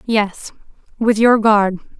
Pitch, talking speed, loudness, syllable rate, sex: 215 Hz, 120 wpm, -15 LUFS, 3.2 syllables/s, female